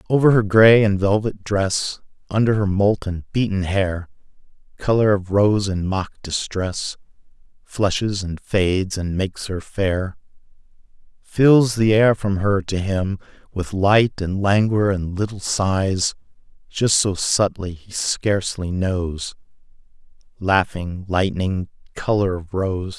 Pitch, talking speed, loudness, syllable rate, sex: 100 Hz, 130 wpm, -20 LUFS, 3.8 syllables/s, male